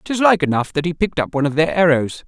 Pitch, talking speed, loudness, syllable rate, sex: 160 Hz, 290 wpm, -17 LUFS, 6.9 syllables/s, male